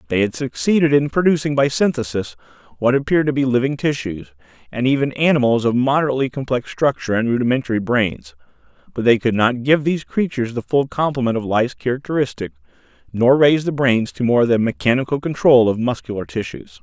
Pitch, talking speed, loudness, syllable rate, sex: 125 Hz, 170 wpm, -18 LUFS, 6.2 syllables/s, male